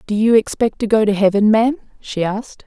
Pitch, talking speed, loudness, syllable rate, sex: 215 Hz, 225 wpm, -16 LUFS, 6.1 syllables/s, female